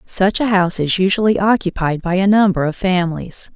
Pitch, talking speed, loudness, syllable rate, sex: 185 Hz, 185 wpm, -16 LUFS, 5.6 syllables/s, female